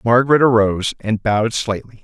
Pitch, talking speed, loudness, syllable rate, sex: 110 Hz, 145 wpm, -16 LUFS, 5.9 syllables/s, male